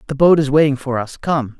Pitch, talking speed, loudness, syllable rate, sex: 140 Hz, 265 wpm, -16 LUFS, 5.8 syllables/s, male